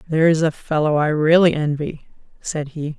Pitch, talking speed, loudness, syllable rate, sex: 155 Hz, 160 wpm, -19 LUFS, 4.7 syllables/s, female